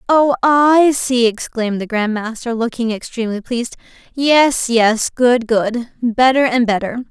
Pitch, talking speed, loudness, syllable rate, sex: 240 Hz, 125 wpm, -15 LUFS, 4.3 syllables/s, female